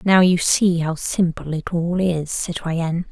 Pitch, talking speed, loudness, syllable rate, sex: 170 Hz, 175 wpm, -20 LUFS, 4.0 syllables/s, female